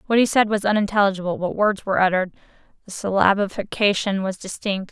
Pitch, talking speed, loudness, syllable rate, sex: 200 Hz, 160 wpm, -21 LUFS, 6.3 syllables/s, female